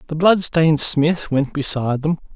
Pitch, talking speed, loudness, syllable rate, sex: 155 Hz, 155 wpm, -18 LUFS, 5.0 syllables/s, male